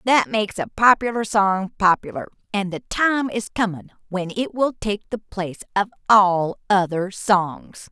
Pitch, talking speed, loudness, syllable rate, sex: 200 Hz, 160 wpm, -21 LUFS, 4.5 syllables/s, female